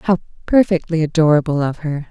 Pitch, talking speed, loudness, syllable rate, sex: 160 Hz, 140 wpm, -17 LUFS, 5.6 syllables/s, female